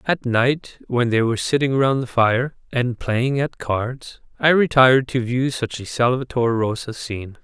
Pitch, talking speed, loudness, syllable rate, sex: 125 Hz, 180 wpm, -20 LUFS, 4.4 syllables/s, male